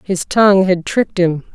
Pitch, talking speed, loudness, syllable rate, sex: 185 Hz, 195 wpm, -14 LUFS, 5.1 syllables/s, female